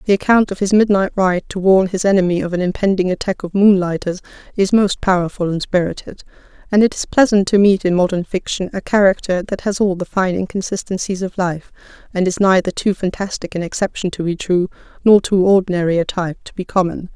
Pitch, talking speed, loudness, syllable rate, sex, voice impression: 190 Hz, 205 wpm, -17 LUFS, 5.9 syllables/s, female, feminine, adult-like, slightly muffled, sincere, slightly calm, reassuring, slightly sweet